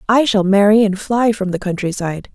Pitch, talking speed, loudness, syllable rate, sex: 205 Hz, 230 wpm, -16 LUFS, 5.1 syllables/s, female